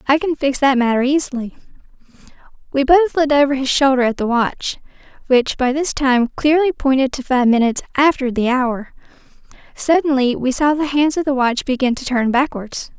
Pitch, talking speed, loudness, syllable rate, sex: 270 Hz, 180 wpm, -17 LUFS, 5.3 syllables/s, female